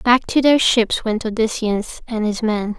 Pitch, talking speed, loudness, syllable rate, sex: 225 Hz, 195 wpm, -18 LUFS, 4.1 syllables/s, female